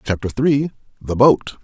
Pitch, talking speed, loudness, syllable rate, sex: 120 Hz, 145 wpm, -17 LUFS, 4.8 syllables/s, male